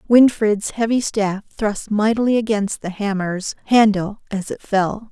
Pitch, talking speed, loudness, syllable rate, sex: 210 Hz, 140 wpm, -19 LUFS, 4.0 syllables/s, female